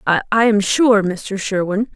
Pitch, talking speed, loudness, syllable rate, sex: 205 Hz, 155 wpm, -16 LUFS, 3.6 syllables/s, female